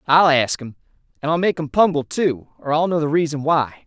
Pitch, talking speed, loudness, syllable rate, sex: 150 Hz, 235 wpm, -19 LUFS, 5.3 syllables/s, male